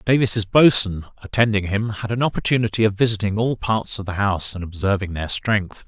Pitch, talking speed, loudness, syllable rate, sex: 105 Hz, 185 wpm, -20 LUFS, 5.5 syllables/s, male